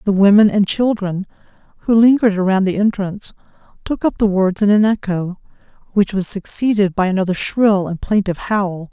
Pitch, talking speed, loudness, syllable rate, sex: 200 Hz, 170 wpm, -16 LUFS, 5.5 syllables/s, female